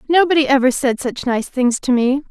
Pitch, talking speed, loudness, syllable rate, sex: 265 Hz, 210 wpm, -16 LUFS, 5.3 syllables/s, female